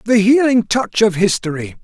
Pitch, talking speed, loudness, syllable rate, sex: 210 Hz, 165 wpm, -15 LUFS, 4.9 syllables/s, male